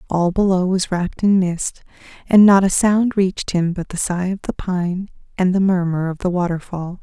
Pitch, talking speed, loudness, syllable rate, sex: 185 Hz, 205 wpm, -18 LUFS, 4.9 syllables/s, female